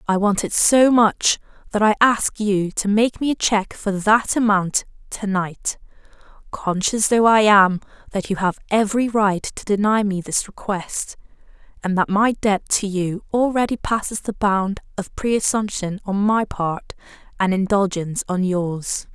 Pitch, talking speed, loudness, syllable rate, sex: 205 Hz, 165 wpm, -19 LUFS, 4.3 syllables/s, female